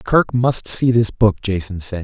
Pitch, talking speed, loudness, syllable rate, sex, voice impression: 110 Hz, 205 wpm, -18 LUFS, 4.0 syllables/s, male, very masculine, very middle-aged, very thick, slightly tensed, powerful, slightly dark, very soft, very muffled, fluent, raspy, very cool, intellectual, slightly refreshing, very sincere, very calm, very mature, very friendly, reassuring, very unique, elegant, wild, very sweet, slightly lively, kind, very modest